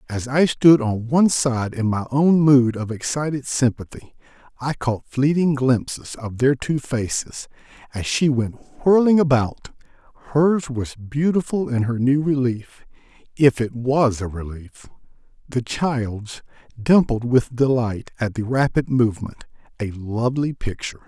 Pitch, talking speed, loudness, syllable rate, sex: 130 Hz, 135 wpm, -20 LUFS, 4.3 syllables/s, male